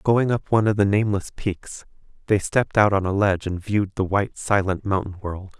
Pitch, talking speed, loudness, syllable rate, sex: 100 Hz, 215 wpm, -22 LUFS, 5.9 syllables/s, male